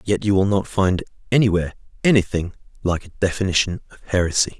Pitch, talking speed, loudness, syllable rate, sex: 95 Hz, 155 wpm, -20 LUFS, 6.6 syllables/s, male